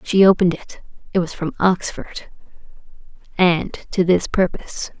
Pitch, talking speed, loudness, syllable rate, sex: 180 Hz, 130 wpm, -19 LUFS, 4.6 syllables/s, female